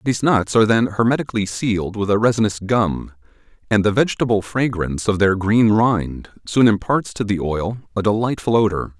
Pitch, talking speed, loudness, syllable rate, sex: 105 Hz, 175 wpm, -18 LUFS, 5.4 syllables/s, male